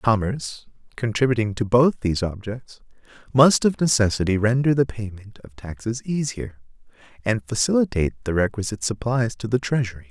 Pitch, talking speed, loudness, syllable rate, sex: 110 Hz, 135 wpm, -22 LUFS, 5.4 syllables/s, male